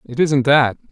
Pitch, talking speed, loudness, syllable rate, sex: 135 Hz, 200 wpm, -15 LUFS, 4.3 syllables/s, male